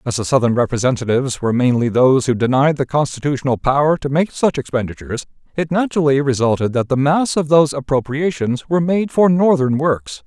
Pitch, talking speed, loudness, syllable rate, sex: 140 Hz, 175 wpm, -17 LUFS, 6.1 syllables/s, male